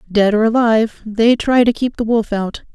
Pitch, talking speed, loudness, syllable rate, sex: 225 Hz, 220 wpm, -15 LUFS, 4.9 syllables/s, female